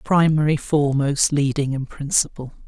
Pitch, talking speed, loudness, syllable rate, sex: 145 Hz, 110 wpm, -20 LUFS, 4.9 syllables/s, male